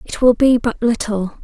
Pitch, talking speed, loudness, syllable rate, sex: 230 Hz, 210 wpm, -16 LUFS, 4.7 syllables/s, female